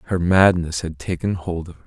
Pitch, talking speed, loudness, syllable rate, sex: 85 Hz, 225 wpm, -20 LUFS, 5.0 syllables/s, male